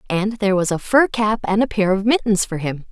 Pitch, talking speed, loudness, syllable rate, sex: 205 Hz, 270 wpm, -18 LUFS, 5.6 syllables/s, female